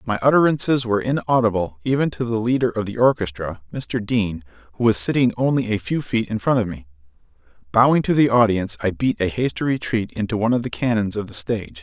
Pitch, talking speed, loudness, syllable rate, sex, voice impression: 110 Hz, 210 wpm, -20 LUFS, 6.2 syllables/s, male, masculine, adult-like, tensed, powerful, soft, clear, cool, calm, slightly mature, friendly, wild, lively, slightly kind